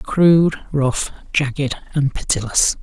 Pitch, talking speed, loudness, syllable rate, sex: 140 Hz, 105 wpm, -18 LUFS, 3.6 syllables/s, male